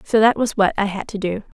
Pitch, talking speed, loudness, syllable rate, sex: 205 Hz, 300 wpm, -19 LUFS, 6.1 syllables/s, female